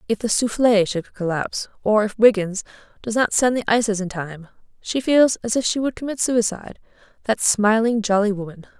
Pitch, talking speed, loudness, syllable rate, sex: 215 Hz, 170 wpm, -20 LUFS, 5.3 syllables/s, female